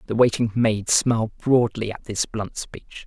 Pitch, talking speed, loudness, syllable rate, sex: 110 Hz, 175 wpm, -22 LUFS, 4.3 syllables/s, male